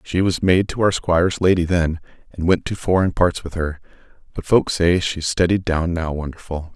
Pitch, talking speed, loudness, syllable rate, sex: 85 Hz, 205 wpm, -19 LUFS, 5.0 syllables/s, male